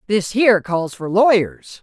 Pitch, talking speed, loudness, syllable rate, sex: 205 Hz, 165 wpm, -16 LUFS, 4.2 syllables/s, female